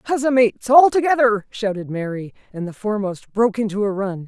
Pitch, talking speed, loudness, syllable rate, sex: 220 Hz, 180 wpm, -19 LUFS, 6.0 syllables/s, female